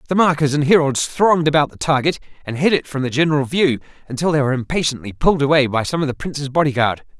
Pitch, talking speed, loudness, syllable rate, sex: 145 Hz, 225 wpm, -18 LUFS, 6.9 syllables/s, male